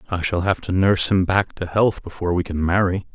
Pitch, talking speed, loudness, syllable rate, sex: 95 Hz, 250 wpm, -20 LUFS, 5.9 syllables/s, male